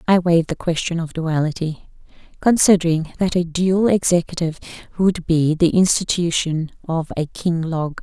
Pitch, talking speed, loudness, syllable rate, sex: 170 Hz, 140 wpm, -19 LUFS, 5.2 syllables/s, female